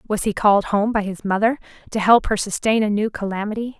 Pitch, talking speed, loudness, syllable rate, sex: 210 Hz, 220 wpm, -20 LUFS, 5.9 syllables/s, female